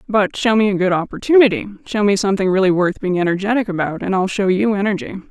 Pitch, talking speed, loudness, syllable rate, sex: 200 Hz, 215 wpm, -17 LUFS, 6.7 syllables/s, female